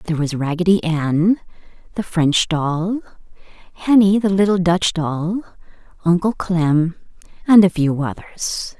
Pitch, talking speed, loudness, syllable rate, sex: 175 Hz, 125 wpm, -18 LUFS, 4.3 syllables/s, female